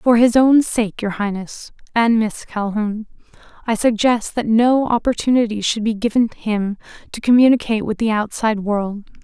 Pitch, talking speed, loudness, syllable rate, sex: 225 Hz, 155 wpm, -18 LUFS, 4.9 syllables/s, female